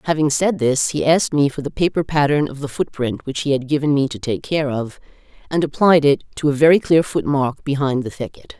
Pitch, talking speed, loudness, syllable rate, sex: 140 Hz, 230 wpm, -18 LUFS, 5.6 syllables/s, female